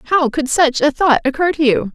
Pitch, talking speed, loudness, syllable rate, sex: 285 Hz, 245 wpm, -15 LUFS, 4.8 syllables/s, female